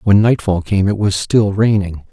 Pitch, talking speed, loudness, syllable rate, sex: 100 Hz, 200 wpm, -15 LUFS, 4.6 syllables/s, male